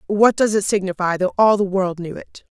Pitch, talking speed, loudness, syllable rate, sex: 195 Hz, 235 wpm, -18 LUFS, 5.2 syllables/s, female